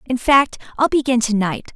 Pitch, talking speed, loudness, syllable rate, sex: 250 Hz, 205 wpm, -17 LUFS, 4.8 syllables/s, female